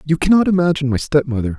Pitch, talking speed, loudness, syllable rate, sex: 150 Hz, 190 wpm, -16 LUFS, 7.8 syllables/s, male